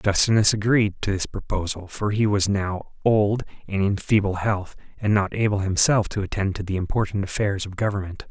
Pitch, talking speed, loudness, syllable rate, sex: 100 Hz, 190 wpm, -23 LUFS, 5.2 syllables/s, male